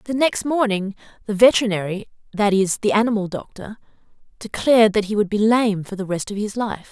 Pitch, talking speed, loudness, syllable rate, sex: 210 Hz, 175 wpm, -19 LUFS, 5.8 syllables/s, female